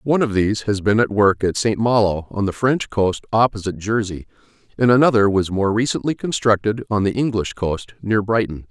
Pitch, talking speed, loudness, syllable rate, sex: 105 Hz, 195 wpm, -19 LUFS, 5.4 syllables/s, male